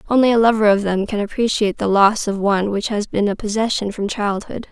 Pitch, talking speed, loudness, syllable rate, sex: 210 Hz, 230 wpm, -18 LUFS, 6.0 syllables/s, female